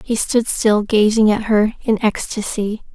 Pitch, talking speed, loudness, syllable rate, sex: 215 Hz, 165 wpm, -17 LUFS, 4.2 syllables/s, female